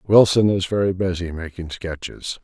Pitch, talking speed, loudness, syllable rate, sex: 90 Hz, 150 wpm, -21 LUFS, 4.6 syllables/s, male